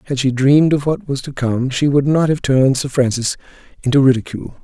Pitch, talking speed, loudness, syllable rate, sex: 135 Hz, 220 wpm, -16 LUFS, 6.1 syllables/s, male